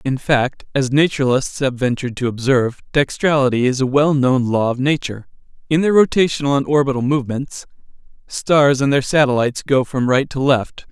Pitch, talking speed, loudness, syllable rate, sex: 135 Hz, 165 wpm, -17 LUFS, 5.6 syllables/s, male